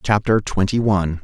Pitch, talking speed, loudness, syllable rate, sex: 100 Hz, 145 wpm, -18 LUFS, 5.3 syllables/s, male